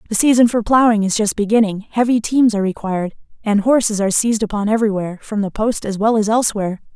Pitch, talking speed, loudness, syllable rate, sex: 215 Hz, 205 wpm, -16 LUFS, 6.8 syllables/s, female